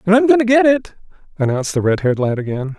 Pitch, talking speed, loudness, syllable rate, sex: 180 Hz, 260 wpm, -16 LUFS, 7.0 syllables/s, male